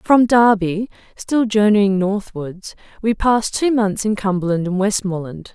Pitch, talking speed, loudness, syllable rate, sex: 205 Hz, 140 wpm, -17 LUFS, 4.2 syllables/s, female